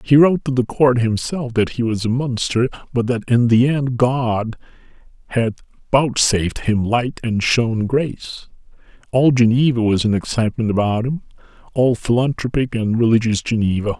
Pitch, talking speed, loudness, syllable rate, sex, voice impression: 120 Hz, 150 wpm, -18 LUFS, 4.9 syllables/s, male, masculine, middle-aged, thick, tensed, powerful, slightly bright, clear, slightly cool, calm, mature, friendly, reassuring, wild, lively, kind